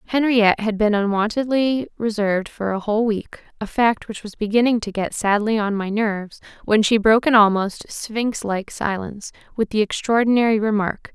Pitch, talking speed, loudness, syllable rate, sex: 215 Hz, 165 wpm, -20 LUFS, 5.3 syllables/s, female